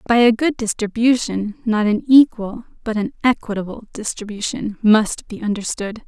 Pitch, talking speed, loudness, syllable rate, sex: 220 Hz, 140 wpm, -18 LUFS, 4.8 syllables/s, female